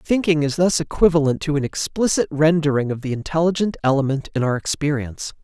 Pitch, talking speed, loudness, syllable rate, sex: 150 Hz, 165 wpm, -20 LUFS, 6.0 syllables/s, male